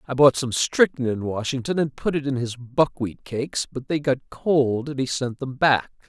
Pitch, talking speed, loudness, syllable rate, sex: 135 Hz, 215 wpm, -23 LUFS, 4.9 syllables/s, male